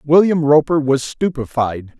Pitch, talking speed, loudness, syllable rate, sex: 145 Hz, 120 wpm, -16 LUFS, 4.2 syllables/s, male